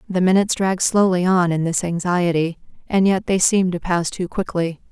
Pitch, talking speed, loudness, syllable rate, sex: 180 Hz, 195 wpm, -19 LUFS, 5.5 syllables/s, female